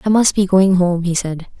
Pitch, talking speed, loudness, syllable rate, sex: 185 Hz, 265 wpm, -15 LUFS, 5.1 syllables/s, female